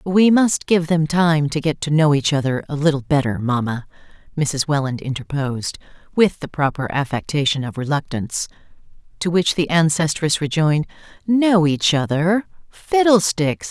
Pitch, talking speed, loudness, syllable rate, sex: 155 Hz, 145 wpm, -19 LUFS, 4.8 syllables/s, female